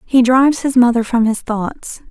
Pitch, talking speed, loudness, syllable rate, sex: 245 Hz, 200 wpm, -14 LUFS, 4.6 syllables/s, female